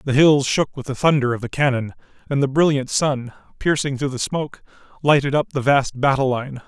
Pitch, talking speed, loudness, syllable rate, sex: 135 Hz, 205 wpm, -20 LUFS, 5.5 syllables/s, male